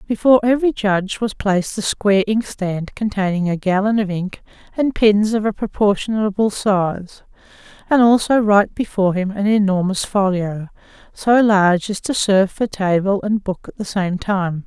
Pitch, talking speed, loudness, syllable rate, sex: 200 Hz, 165 wpm, -17 LUFS, 4.9 syllables/s, female